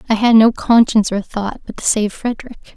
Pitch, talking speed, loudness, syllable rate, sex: 220 Hz, 215 wpm, -15 LUFS, 6.0 syllables/s, female